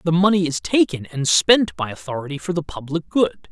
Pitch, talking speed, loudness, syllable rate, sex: 160 Hz, 205 wpm, -20 LUFS, 5.3 syllables/s, male